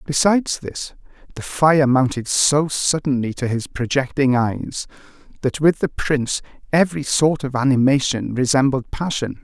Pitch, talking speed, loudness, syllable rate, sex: 140 Hz, 135 wpm, -19 LUFS, 4.6 syllables/s, male